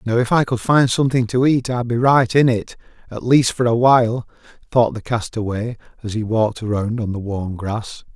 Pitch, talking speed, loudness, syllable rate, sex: 115 Hz, 205 wpm, -18 LUFS, 5.2 syllables/s, male